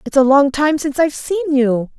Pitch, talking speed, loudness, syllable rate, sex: 275 Hz, 240 wpm, -15 LUFS, 5.5 syllables/s, female